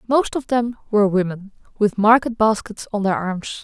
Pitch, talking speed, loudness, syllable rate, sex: 215 Hz, 180 wpm, -19 LUFS, 4.9 syllables/s, female